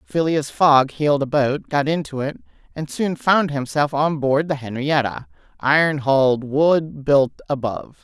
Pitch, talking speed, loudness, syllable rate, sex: 145 Hz, 155 wpm, -19 LUFS, 4.4 syllables/s, female